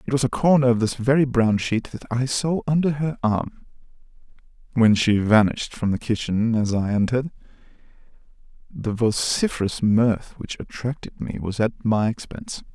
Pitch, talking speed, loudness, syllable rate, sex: 120 Hz, 160 wpm, -22 LUFS, 5.0 syllables/s, male